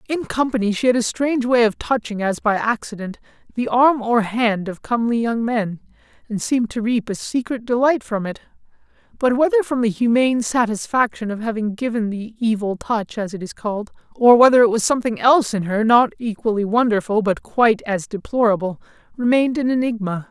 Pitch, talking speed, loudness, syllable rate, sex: 230 Hz, 185 wpm, -19 LUFS, 5.6 syllables/s, male